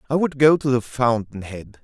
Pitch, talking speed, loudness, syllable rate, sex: 125 Hz, 230 wpm, -19 LUFS, 5.0 syllables/s, male